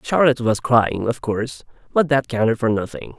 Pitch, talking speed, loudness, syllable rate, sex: 115 Hz, 190 wpm, -19 LUFS, 5.4 syllables/s, male